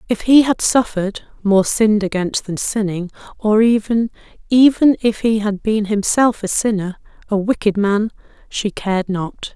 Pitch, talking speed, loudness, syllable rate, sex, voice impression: 210 Hz, 155 wpm, -17 LUFS, 4.6 syllables/s, female, very feminine, adult-like, slightly middle-aged, very thin, slightly relaxed, slightly weak, slightly dark, slightly hard, clear, slightly fluent, slightly raspy, cool, very intellectual, slightly refreshing, very sincere, calm, friendly, very reassuring, slightly unique, elegant, slightly sweet, slightly lively, kind, slightly intense